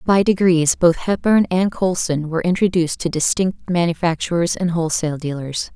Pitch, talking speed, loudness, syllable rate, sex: 170 Hz, 145 wpm, -18 LUFS, 5.5 syllables/s, female